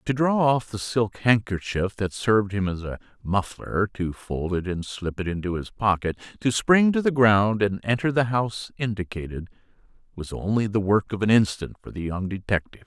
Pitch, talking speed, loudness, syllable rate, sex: 105 Hz, 195 wpm, -24 LUFS, 5.1 syllables/s, male